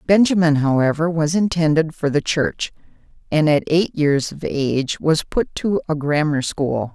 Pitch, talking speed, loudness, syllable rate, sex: 155 Hz, 165 wpm, -19 LUFS, 4.4 syllables/s, female